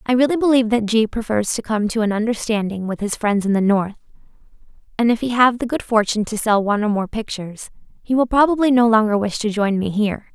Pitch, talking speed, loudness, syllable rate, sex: 220 Hz, 230 wpm, -18 LUFS, 6.3 syllables/s, female